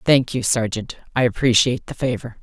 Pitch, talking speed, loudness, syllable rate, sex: 120 Hz, 175 wpm, -20 LUFS, 5.7 syllables/s, female